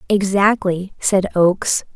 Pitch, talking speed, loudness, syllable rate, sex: 190 Hz, 90 wpm, -17 LUFS, 3.8 syllables/s, female